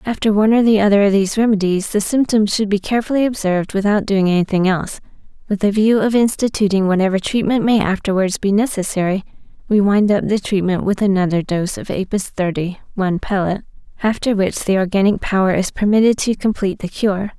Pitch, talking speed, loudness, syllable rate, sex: 200 Hz, 185 wpm, -17 LUFS, 6.1 syllables/s, female